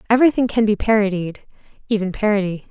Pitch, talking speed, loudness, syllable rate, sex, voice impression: 210 Hz, 135 wpm, -18 LUFS, 6.7 syllables/s, female, very feminine, adult-like, slightly clear, slightly calm, elegant